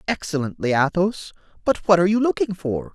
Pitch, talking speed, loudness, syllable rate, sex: 175 Hz, 165 wpm, -21 LUFS, 5.7 syllables/s, male